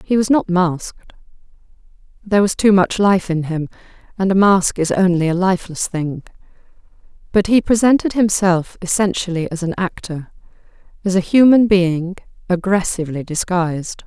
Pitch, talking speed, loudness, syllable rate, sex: 185 Hz, 135 wpm, -16 LUFS, 5.1 syllables/s, female